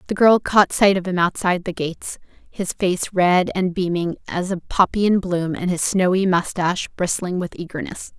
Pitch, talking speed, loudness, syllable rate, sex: 180 Hz, 190 wpm, -20 LUFS, 5.0 syllables/s, female